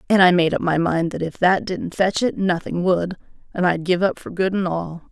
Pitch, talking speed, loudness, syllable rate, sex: 180 Hz, 260 wpm, -20 LUFS, 5.1 syllables/s, female